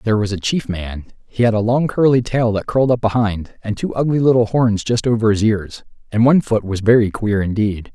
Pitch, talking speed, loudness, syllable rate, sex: 110 Hz, 235 wpm, -17 LUFS, 5.6 syllables/s, male